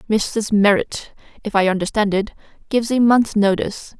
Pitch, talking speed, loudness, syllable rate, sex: 210 Hz, 150 wpm, -18 LUFS, 5.1 syllables/s, female